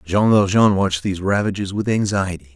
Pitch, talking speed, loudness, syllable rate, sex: 95 Hz, 165 wpm, -18 LUFS, 5.7 syllables/s, male